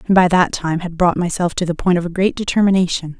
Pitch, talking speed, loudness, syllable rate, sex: 175 Hz, 265 wpm, -17 LUFS, 6.3 syllables/s, female